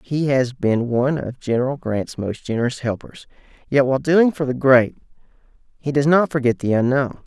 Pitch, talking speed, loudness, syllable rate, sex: 130 Hz, 180 wpm, -19 LUFS, 5.3 syllables/s, male